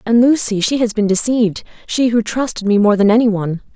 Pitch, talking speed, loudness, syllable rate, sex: 220 Hz, 210 wpm, -15 LUFS, 6.0 syllables/s, female